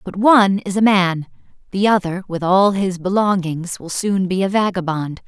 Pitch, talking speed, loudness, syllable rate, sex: 190 Hz, 170 wpm, -17 LUFS, 4.7 syllables/s, female